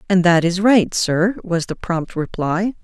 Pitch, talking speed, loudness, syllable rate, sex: 185 Hz, 190 wpm, -18 LUFS, 4.0 syllables/s, female